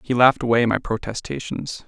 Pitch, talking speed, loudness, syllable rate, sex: 120 Hz, 160 wpm, -21 LUFS, 5.7 syllables/s, male